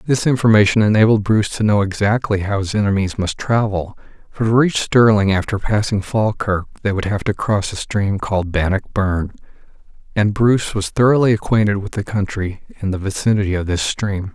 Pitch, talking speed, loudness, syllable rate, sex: 105 Hz, 180 wpm, -17 LUFS, 5.4 syllables/s, male